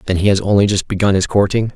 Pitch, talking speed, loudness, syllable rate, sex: 100 Hz, 275 wpm, -15 LUFS, 6.9 syllables/s, male